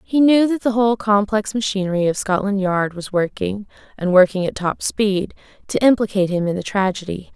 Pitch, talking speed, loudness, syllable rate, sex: 200 Hz, 190 wpm, -19 LUFS, 5.4 syllables/s, female